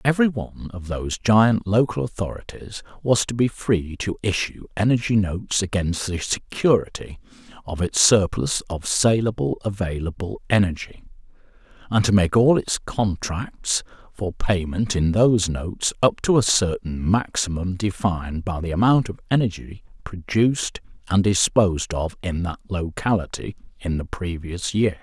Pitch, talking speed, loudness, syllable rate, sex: 100 Hz, 140 wpm, -22 LUFS, 4.7 syllables/s, male